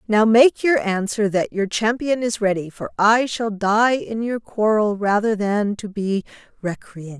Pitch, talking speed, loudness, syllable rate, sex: 210 Hz, 175 wpm, -20 LUFS, 4.1 syllables/s, female